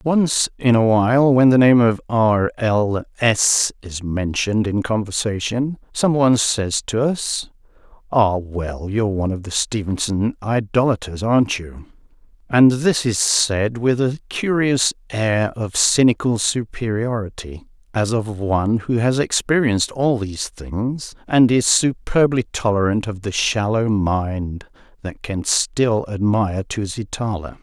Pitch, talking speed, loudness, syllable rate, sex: 110 Hz, 135 wpm, -19 LUFS, 4.1 syllables/s, male